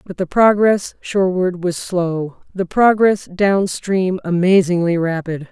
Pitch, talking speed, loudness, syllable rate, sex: 185 Hz, 130 wpm, -17 LUFS, 3.9 syllables/s, female